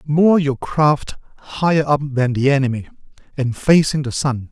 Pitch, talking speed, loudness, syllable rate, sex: 140 Hz, 160 wpm, -17 LUFS, 4.1 syllables/s, male